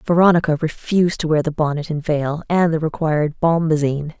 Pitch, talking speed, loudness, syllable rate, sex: 155 Hz, 170 wpm, -18 LUFS, 5.8 syllables/s, female